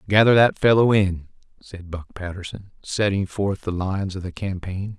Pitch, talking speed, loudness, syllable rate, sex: 95 Hz, 170 wpm, -21 LUFS, 4.9 syllables/s, male